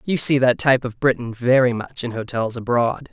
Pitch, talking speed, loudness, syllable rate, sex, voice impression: 125 Hz, 210 wpm, -19 LUFS, 5.3 syllables/s, male, very masculine, adult-like, slightly thick, very tensed, powerful, very bright, very soft, very clear, very fluent, slightly raspy, cool, intellectual, very refreshing, sincere, calm, slightly mature, friendly, reassuring, unique, elegant, wild, sweet, very lively, kind, slightly modest